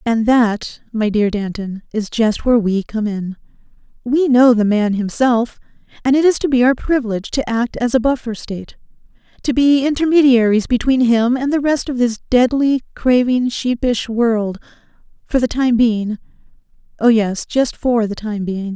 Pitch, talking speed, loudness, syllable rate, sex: 235 Hz, 170 wpm, -16 LUFS, 4.7 syllables/s, female